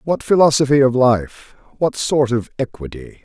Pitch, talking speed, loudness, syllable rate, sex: 130 Hz, 150 wpm, -16 LUFS, 4.6 syllables/s, male